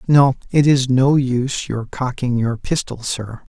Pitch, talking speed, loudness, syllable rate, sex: 130 Hz, 170 wpm, -18 LUFS, 4.2 syllables/s, male